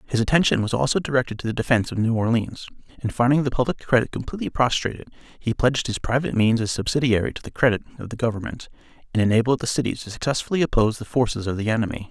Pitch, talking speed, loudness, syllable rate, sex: 120 Hz, 215 wpm, -22 LUFS, 7.4 syllables/s, male